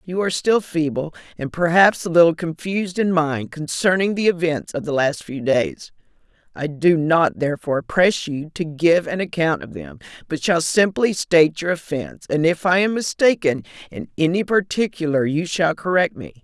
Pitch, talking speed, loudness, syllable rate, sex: 165 Hz, 180 wpm, -19 LUFS, 5.0 syllables/s, female